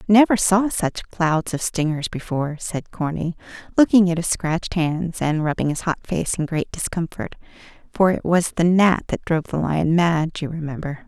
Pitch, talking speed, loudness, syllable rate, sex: 170 Hz, 180 wpm, -21 LUFS, 4.8 syllables/s, female